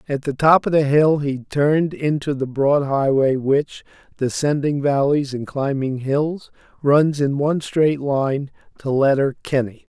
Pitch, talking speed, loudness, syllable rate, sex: 140 Hz, 150 wpm, -19 LUFS, 4.1 syllables/s, male